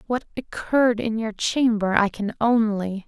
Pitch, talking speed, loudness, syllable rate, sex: 220 Hz, 155 wpm, -22 LUFS, 4.3 syllables/s, female